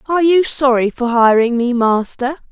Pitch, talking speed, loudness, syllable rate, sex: 255 Hz, 165 wpm, -14 LUFS, 4.9 syllables/s, female